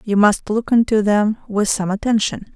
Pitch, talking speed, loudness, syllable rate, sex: 210 Hz, 190 wpm, -17 LUFS, 4.7 syllables/s, female